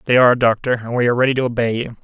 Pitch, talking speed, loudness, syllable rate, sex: 120 Hz, 295 wpm, -17 LUFS, 8.2 syllables/s, male